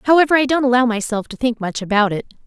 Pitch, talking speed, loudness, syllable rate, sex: 240 Hz, 245 wpm, -17 LUFS, 6.7 syllables/s, female